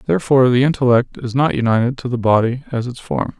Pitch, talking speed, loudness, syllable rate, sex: 125 Hz, 210 wpm, -17 LUFS, 6.5 syllables/s, male